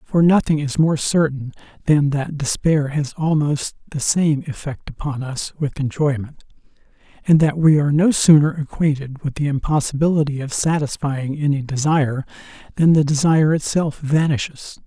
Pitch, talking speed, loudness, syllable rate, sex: 150 Hz, 145 wpm, -19 LUFS, 4.9 syllables/s, male